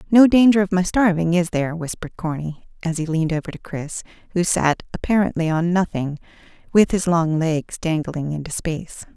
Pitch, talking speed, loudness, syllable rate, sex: 170 Hz, 175 wpm, -20 LUFS, 5.5 syllables/s, female